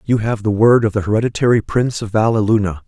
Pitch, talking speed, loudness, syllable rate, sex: 110 Hz, 210 wpm, -16 LUFS, 6.7 syllables/s, male